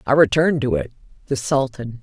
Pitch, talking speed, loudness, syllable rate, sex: 130 Hz, 150 wpm, -19 LUFS, 5.9 syllables/s, female